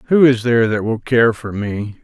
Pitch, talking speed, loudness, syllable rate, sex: 115 Hz, 235 wpm, -16 LUFS, 4.9 syllables/s, male